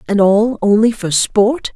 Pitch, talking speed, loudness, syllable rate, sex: 210 Hz, 170 wpm, -13 LUFS, 3.9 syllables/s, female